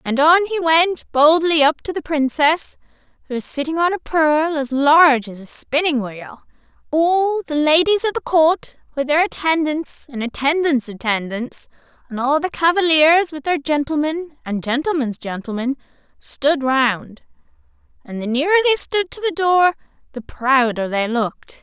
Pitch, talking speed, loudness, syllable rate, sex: 295 Hz, 160 wpm, -18 LUFS, 4.5 syllables/s, female